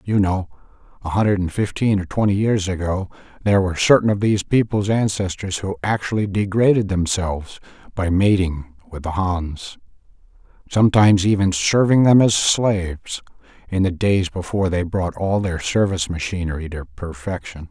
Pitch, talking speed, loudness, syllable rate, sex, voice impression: 95 Hz, 150 wpm, -19 LUFS, 5.3 syllables/s, male, masculine, middle-aged, tensed, slightly weak, soft, slightly raspy, cool, intellectual, sincere, calm, mature, friendly, reassuring, lively, slightly strict